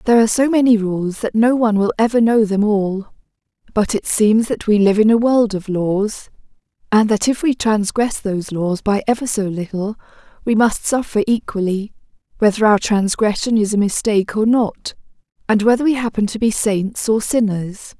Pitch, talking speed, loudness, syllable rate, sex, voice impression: 215 Hz, 185 wpm, -17 LUFS, 5.1 syllables/s, female, feminine, adult-like, relaxed, soft, fluent, slightly raspy, slightly cute, slightly calm, friendly, reassuring, slightly elegant, kind, modest